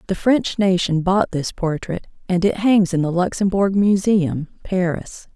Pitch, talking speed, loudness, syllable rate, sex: 185 Hz, 155 wpm, -19 LUFS, 4.2 syllables/s, female